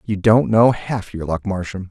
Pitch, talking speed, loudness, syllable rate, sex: 100 Hz, 220 wpm, -18 LUFS, 4.4 syllables/s, male